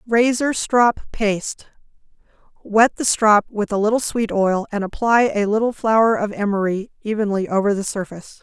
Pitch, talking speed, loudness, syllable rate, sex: 210 Hz, 150 wpm, -19 LUFS, 4.9 syllables/s, female